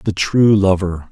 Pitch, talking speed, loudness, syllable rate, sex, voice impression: 100 Hz, 160 wpm, -14 LUFS, 3.7 syllables/s, male, masculine, very adult-like, cool, sincere, slightly calm, slightly wild